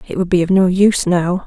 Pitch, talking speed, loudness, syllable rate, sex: 180 Hz, 285 wpm, -14 LUFS, 6.0 syllables/s, female